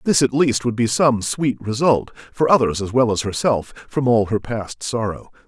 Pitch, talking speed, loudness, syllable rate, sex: 120 Hz, 210 wpm, -19 LUFS, 4.7 syllables/s, male